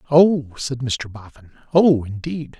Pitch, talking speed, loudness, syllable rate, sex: 135 Hz, 140 wpm, -19 LUFS, 3.8 syllables/s, male